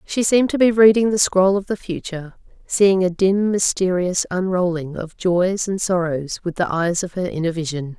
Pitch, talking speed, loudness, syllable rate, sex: 185 Hz, 195 wpm, -19 LUFS, 4.9 syllables/s, female